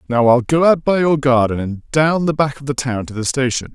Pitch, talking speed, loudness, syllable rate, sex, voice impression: 135 Hz, 275 wpm, -16 LUFS, 5.4 syllables/s, male, masculine, adult-like, thick, tensed, slightly bright, slightly hard, clear, slightly muffled, intellectual, calm, slightly mature, slightly friendly, reassuring, wild, slightly lively, slightly kind